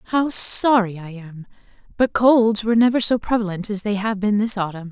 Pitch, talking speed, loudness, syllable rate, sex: 210 Hz, 195 wpm, -18 LUFS, 5.3 syllables/s, female